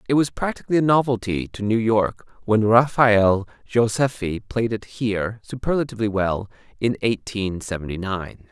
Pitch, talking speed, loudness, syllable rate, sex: 110 Hz, 140 wpm, -22 LUFS, 4.9 syllables/s, male